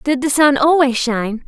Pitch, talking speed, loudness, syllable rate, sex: 270 Hz, 205 wpm, -15 LUFS, 4.9 syllables/s, female